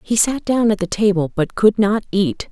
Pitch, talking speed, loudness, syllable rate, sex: 205 Hz, 240 wpm, -17 LUFS, 4.8 syllables/s, female